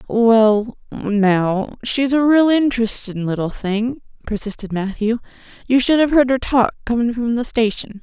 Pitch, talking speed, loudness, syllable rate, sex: 230 Hz, 150 wpm, -18 LUFS, 4.4 syllables/s, female